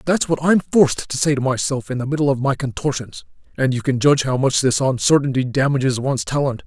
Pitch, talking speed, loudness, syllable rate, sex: 130 Hz, 225 wpm, -18 LUFS, 6.1 syllables/s, male